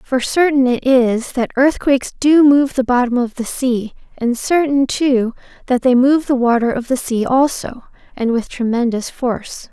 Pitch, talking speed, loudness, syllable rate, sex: 255 Hz, 180 wpm, -16 LUFS, 4.5 syllables/s, female